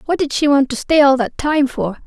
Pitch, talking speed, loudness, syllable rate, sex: 275 Hz, 290 wpm, -15 LUFS, 5.2 syllables/s, female